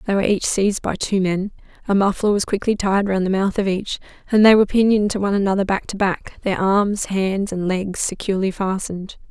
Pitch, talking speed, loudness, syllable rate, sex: 195 Hz, 220 wpm, -19 LUFS, 5.9 syllables/s, female